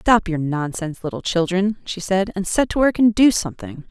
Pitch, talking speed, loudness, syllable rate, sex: 190 Hz, 215 wpm, -20 LUFS, 5.4 syllables/s, female